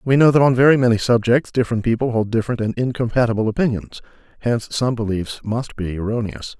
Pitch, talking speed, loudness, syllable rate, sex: 115 Hz, 180 wpm, -19 LUFS, 6.4 syllables/s, male